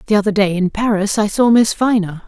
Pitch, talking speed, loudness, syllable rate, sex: 205 Hz, 235 wpm, -15 LUFS, 5.8 syllables/s, female